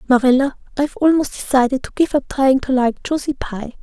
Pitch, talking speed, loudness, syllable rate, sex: 270 Hz, 190 wpm, -18 LUFS, 5.9 syllables/s, female